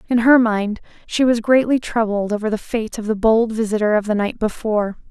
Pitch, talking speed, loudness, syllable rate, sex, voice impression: 220 Hz, 210 wpm, -18 LUFS, 5.4 syllables/s, female, very feminine, young, very thin, tensed, powerful, bright, soft, slightly clear, fluent, slightly raspy, very cute, intellectual, very refreshing, sincere, calm, very friendly, reassuring, very unique, elegant, slightly wild, sweet, lively, kind, slightly intense, slightly modest, light